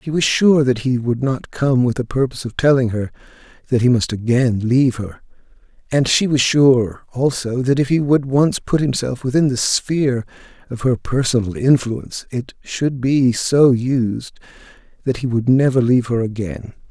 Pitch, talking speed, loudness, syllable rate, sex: 130 Hz, 180 wpm, -17 LUFS, 4.8 syllables/s, male